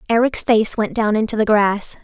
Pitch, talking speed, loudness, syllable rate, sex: 215 Hz, 205 wpm, -17 LUFS, 5.0 syllables/s, female